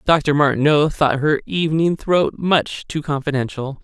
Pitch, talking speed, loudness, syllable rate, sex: 150 Hz, 140 wpm, -18 LUFS, 4.4 syllables/s, male